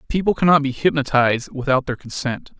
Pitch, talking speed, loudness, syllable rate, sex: 140 Hz, 160 wpm, -19 LUFS, 5.9 syllables/s, male